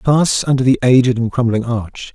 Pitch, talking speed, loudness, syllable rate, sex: 125 Hz, 195 wpm, -15 LUFS, 5.0 syllables/s, male